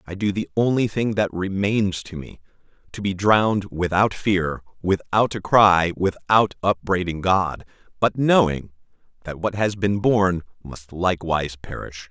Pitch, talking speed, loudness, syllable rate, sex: 95 Hz, 145 wpm, -21 LUFS, 4.3 syllables/s, male